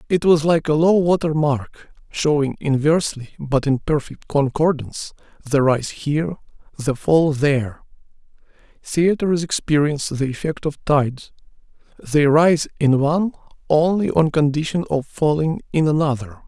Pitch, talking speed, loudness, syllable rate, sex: 150 Hz, 130 wpm, -19 LUFS, 4.7 syllables/s, male